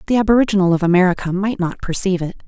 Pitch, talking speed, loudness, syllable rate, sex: 190 Hz, 195 wpm, -17 LUFS, 7.5 syllables/s, female